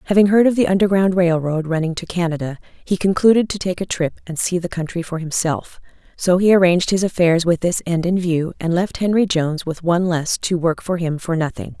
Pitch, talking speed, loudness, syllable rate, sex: 175 Hz, 230 wpm, -18 LUFS, 5.7 syllables/s, female